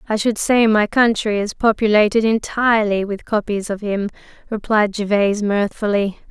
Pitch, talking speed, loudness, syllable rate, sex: 210 Hz, 145 wpm, -17 LUFS, 5.0 syllables/s, female